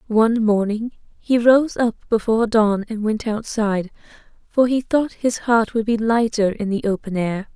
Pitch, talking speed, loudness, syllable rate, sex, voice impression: 220 Hz, 175 wpm, -19 LUFS, 4.6 syllables/s, female, very feminine, slightly young, very thin, tensed, very weak, slightly dark, very soft, clear, fluent, raspy, very cute, very intellectual, refreshing, very sincere, very calm, very friendly, very reassuring, very unique, elegant, slightly wild, very sweet, lively, very kind, very modest, very light